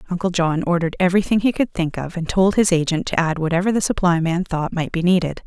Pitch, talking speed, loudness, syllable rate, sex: 175 Hz, 240 wpm, -19 LUFS, 6.3 syllables/s, female